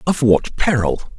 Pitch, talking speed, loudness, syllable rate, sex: 130 Hz, 150 wpm, -17 LUFS, 3.9 syllables/s, male